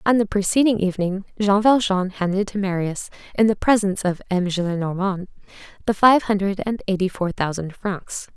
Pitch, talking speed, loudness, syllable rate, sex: 195 Hz, 165 wpm, -21 LUFS, 5.4 syllables/s, female